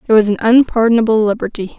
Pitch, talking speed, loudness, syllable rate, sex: 220 Hz, 170 wpm, -13 LUFS, 7.0 syllables/s, female